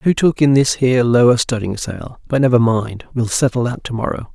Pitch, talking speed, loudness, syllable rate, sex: 120 Hz, 205 wpm, -16 LUFS, 5.4 syllables/s, male